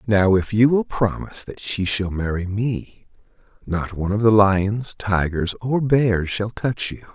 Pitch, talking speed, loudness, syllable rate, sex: 105 Hz, 175 wpm, -21 LUFS, 4.1 syllables/s, male